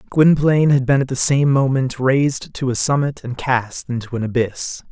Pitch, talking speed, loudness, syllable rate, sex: 135 Hz, 195 wpm, -18 LUFS, 4.9 syllables/s, male